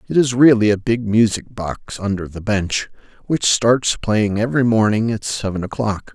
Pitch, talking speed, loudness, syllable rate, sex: 110 Hz, 175 wpm, -18 LUFS, 4.7 syllables/s, male